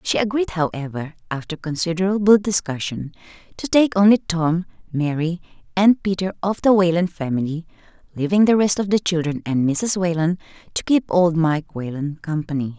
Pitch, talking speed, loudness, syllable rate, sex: 175 Hz, 150 wpm, -20 LUFS, 5.1 syllables/s, female